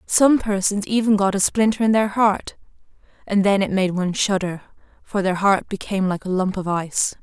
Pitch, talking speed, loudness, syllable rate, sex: 200 Hz, 200 wpm, -20 LUFS, 5.4 syllables/s, female